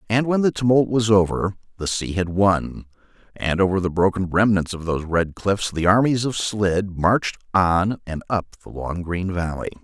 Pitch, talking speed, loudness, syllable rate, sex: 95 Hz, 190 wpm, -21 LUFS, 4.8 syllables/s, male